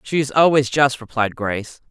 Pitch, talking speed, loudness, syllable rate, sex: 130 Hz, 190 wpm, -18 LUFS, 5.1 syllables/s, female